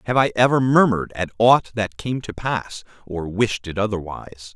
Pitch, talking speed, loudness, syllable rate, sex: 110 Hz, 185 wpm, -20 LUFS, 5.0 syllables/s, male